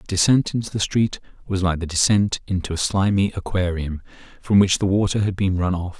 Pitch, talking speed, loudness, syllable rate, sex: 95 Hz, 210 wpm, -21 LUFS, 5.7 syllables/s, male